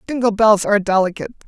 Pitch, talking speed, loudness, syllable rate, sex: 210 Hz, 165 wpm, -16 LUFS, 7.6 syllables/s, female